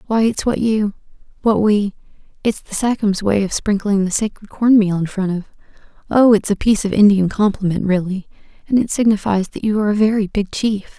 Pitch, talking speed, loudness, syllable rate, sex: 205 Hz, 185 wpm, -17 LUFS, 5.6 syllables/s, female